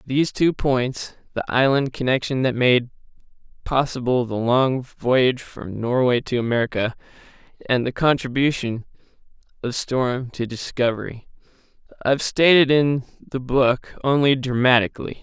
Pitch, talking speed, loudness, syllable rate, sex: 130 Hz, 115 wpm, -21 LUFS, 4.6 syllables/s, male